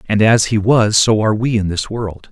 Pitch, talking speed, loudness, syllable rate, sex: 110 Hz, 260 wpm, -14 LUFS, 5.2 syllables/s, male